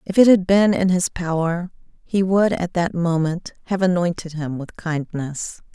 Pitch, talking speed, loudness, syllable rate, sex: 175 Hz, 175 wpm, -20 LUFS, 4.4 syllables/s, female